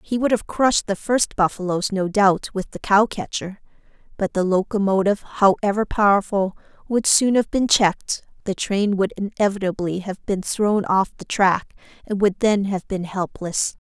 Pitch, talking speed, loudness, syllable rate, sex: 200 Hz, 170 wpm, -21 LUFS, 4.7 syllables/s, female